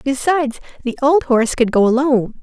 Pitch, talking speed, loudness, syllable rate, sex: 260 Hz, 175 wpm, -16 LUFS, 6.1 syllables/s, female